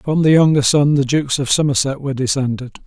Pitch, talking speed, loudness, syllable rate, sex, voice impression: 140 Hz, 210 wpm, -15 LUFS, 6.4 syllables/s, male, very masculine, very adult-like, slightly old, thick, slightly tensed, slightly weak, slightly dark, slightly hard, slightly muffled, fluent, slightly raspy, cool, intellectual, sincere, very calm, very mature, friendly, very reassuring, very unique, elegant, wild, sweet, slightly lively, kind, modest